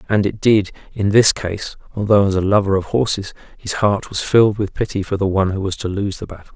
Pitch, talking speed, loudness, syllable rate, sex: 100 Hz, 245 wpm, -18 LUFS, 5.8 syllables/s, male